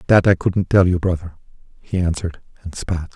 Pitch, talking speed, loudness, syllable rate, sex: 90 Hz, 190 wpm, -19 LUFS, 5.6 syllables/s, male